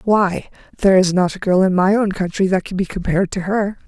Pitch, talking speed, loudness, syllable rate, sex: 190 Hz, 250 wpm, -17 LUFS, 5.9 syllables/s, female